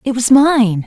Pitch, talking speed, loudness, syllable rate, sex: 245 Hz, 210 wpm, -12 LUFS, 3.9 syllables/s, female